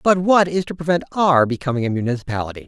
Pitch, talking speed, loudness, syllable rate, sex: 145 Hz, 200 wpm, -19 LUFS, 6.8 syllables/s, male